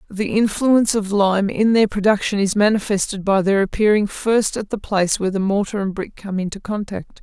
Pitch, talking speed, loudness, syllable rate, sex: 205 Hz, 200 wpm, -19 LUFS, 5.4 syllables/s, female